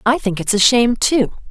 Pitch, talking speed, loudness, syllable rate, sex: 230 Hz, 240 wpm, -15 LUFS, 5.4 syllables/s, female